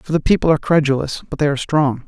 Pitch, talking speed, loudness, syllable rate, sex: 145 Hz, 260 wpm, -17 LUFS, 7.1 syllables/s, male